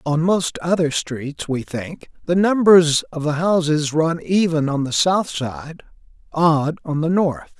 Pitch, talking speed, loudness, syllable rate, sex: 160 Hz, 165 wpm, -19 LUFS, 3.7 syllables/s, male